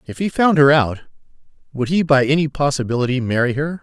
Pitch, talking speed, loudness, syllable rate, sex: 140 Hz, 190 wpm, -17 LUFS, 6.1 syllables/s, male